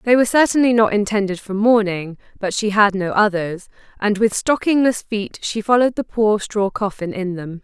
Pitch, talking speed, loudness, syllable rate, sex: 210 Hz, 190 wpm, -18 LUFS, 5.1 syllables/s, female